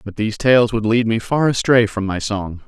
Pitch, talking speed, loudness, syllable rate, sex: 110 Hz, 245 wpm, -17 LUFS, 5.1 syllables/s, male